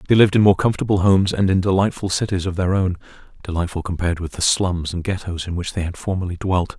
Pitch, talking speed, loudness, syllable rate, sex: 90 Hz, 220 wpm, -20 LUFS, 6.7 syllables/s, male